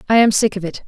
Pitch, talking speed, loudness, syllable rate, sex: 205 Hz, 345 wpm, -15 LUFS, 7.3 syllables/s, female